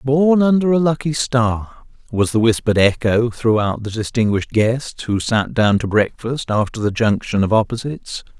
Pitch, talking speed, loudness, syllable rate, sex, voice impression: 120 Hz, 165 wpm, -17 LUFS, 4.8 syllables/s, male, masculine, very adult-like, slightly thick, cool, sincere, slightly calm, elegant